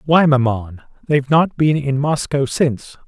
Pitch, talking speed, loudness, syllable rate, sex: 140 Hz, 155 wpm, -17 LUFS, 4.6 syllables/s, male